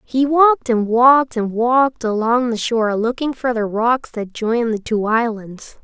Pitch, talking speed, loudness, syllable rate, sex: 235 Hz, 185 wpm, -17 LUFS, 4.6 syllables/s, female